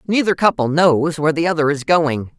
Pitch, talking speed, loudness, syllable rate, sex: 155 Hz, 200 wpm, -16 LUFS, 5.5 syllables/s, female